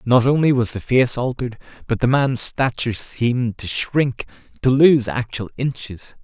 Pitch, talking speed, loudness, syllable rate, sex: 120 Hz, 165 wpm, -19 LUFS, 4.6 syllables/s, male